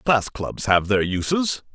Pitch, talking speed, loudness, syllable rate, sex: 120 Hz, 170 wpm, -21 LUFS, 3.7 syllables/s, male